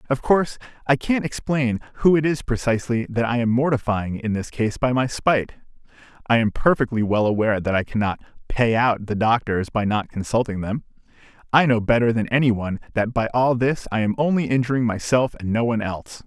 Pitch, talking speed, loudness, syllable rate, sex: 120 Hz, 195 wpm, -21 LUFS, 5.7 syllables/s, male